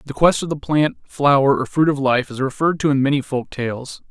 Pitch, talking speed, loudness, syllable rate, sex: 140 Hz, 250 wpm, -19 LUFS, 5.5 syllables/s, male